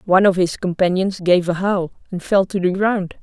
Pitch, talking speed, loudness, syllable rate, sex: 185 Hz, 225 wpm, -18 LUFS, 5.2 syllables/s, female